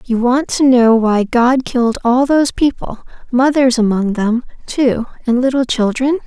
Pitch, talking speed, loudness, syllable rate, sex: 250 Hz, 155 wpm, -14 LUFS, 4.4 syllables/s, female